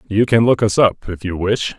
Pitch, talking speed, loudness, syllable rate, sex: 105 Hz, 270 wpm, -16 LUFS, 5.1 syllables/s, male